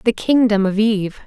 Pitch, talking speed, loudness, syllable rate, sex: 215 Hz, 190 wpm, -16 LUFS, 5.5 syllables/s, female